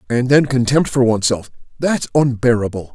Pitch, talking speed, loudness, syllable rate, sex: 125 Hz, 145 wpm, -16 LUFS, 5.4 syllables/s, male